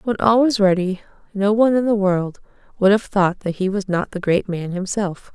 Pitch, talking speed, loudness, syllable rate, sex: 200 Hz, 225 wpm, -19 LUFS, 5.0 syllables/s, female